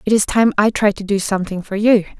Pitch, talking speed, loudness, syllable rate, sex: 205 Hz, 275 wpm, -16 LUFS, 6.3 syllables/s, female